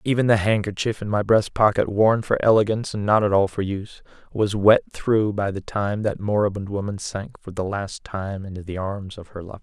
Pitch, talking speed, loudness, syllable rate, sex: 100 Hz, 225 wpm, -22 LUFS, 5.4 syllables/s, male